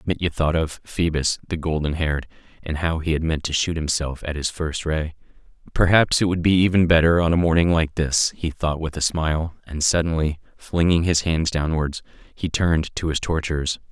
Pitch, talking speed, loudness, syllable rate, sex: 80 Hz, 200 wpm, -21 LUFS, 5.2 syllables/s, male